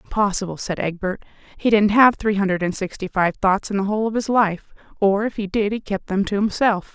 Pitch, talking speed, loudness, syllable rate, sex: 200 Hz, 235 wpm, -20 LUFS, 5.6 syllables/s, female